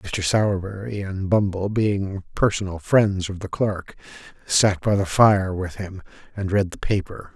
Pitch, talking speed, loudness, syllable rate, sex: 95 Hz, 165 wpm, -22 LUFS, 4.2 syllables/s, male